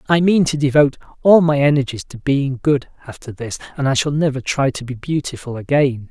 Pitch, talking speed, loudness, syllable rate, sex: 140 Hz, 205 wpm, -17 LUFS, 5.6 syllables/s, male